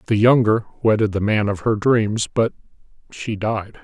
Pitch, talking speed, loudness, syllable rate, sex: 110 Hz, 170 wpm, -19 LUFS, 4.6 syllables/s, male